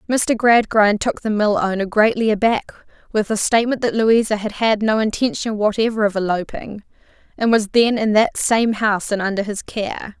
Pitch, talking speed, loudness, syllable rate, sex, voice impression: 215 Hz, 180 wpm, -18 LUFS, 5.1 syllables/s, female, slightly feminine, slightly adult-like, slightly clear, slightly sweet